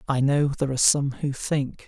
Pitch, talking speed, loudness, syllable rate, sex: 140 Hz, 225 wpm, -23 LUFS, 5.3 syllables/s, male